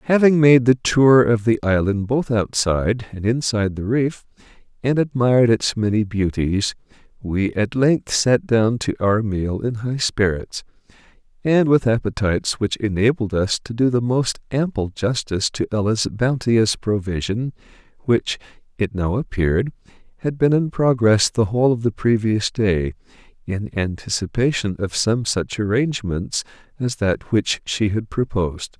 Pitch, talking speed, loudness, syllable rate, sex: 115 Hz, 150 wpm, -20 LUFS, 4.5 syllables/s, male